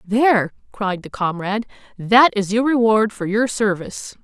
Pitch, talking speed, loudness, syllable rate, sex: 210 Hz, 155 wpm, -18 LUFS, 4.8 syllables/s, female